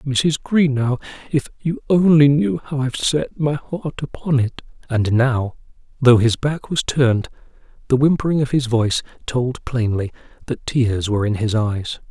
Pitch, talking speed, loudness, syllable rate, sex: 130 Hz, 165 wpm, -19 LUFS, 4.5 syllables/s, male